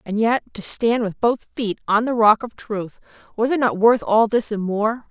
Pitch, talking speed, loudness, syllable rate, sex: 220 Hz, 225 wpm, -20 LUFS, 4.5 syllables/s, female